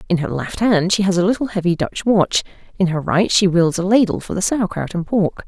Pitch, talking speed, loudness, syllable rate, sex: 185 Hz, 250 wpm, -18 LUFS, 5.5 syllables/s, female